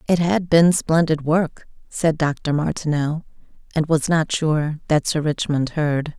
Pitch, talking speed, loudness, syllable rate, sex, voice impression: 155 Hz, 155 wpm, -20 LUFS, 3.8 syllables/s, female, very feminine, very adult-like, slightly intellectual, slightly calm, elegant